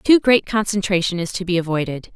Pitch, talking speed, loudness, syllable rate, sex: 185 Hz, 195 wpm, -19 LUFS, 5.7 syllables/s, female